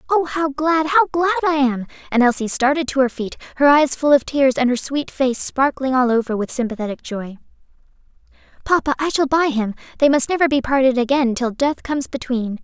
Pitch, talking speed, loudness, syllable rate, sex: 270 Hz, 205 wpm, -18 LUFS, 5.5 syllables/s, female